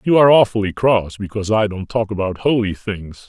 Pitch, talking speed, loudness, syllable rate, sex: 105 Hz, 200 wpm, -17 LUFS, 5.7 syllables/s, male